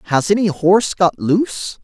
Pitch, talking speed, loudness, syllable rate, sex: 185 Hz, 165 wpm, -16 LUFS, 5.0 syllables/s, male